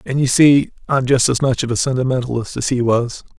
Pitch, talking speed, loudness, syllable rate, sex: 130 Hz, 250 wpm, -16 LUFS, 6.0 syllables/s, male